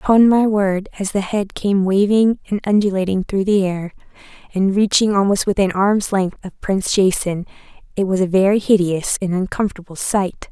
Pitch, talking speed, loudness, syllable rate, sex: 195 Hz, 170 wpm, -17 LUFS, 5.1 syllables/s, female